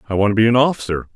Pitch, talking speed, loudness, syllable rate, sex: 110 Hz, 315 wpm, -16 LUFS, 8.5 syllables/s, male